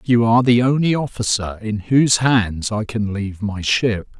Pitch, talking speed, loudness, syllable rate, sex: 115 Hz, 185 wpm, -18 LUFS, 4.8 syllables/s, male